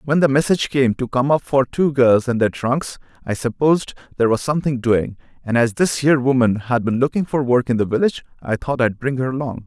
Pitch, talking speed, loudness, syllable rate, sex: 130 Hz, 235 wpm, -18 LUFS, 5.9 syllables/s, male